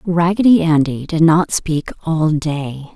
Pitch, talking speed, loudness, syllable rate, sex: 160 Hz, 140 wpm, -15 LUFS, 3.7 syllables/s, female